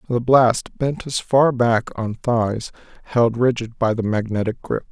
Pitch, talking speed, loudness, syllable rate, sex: 120 Hz, 170 wpm, -20 LUFS, 3.9 syllables/s, male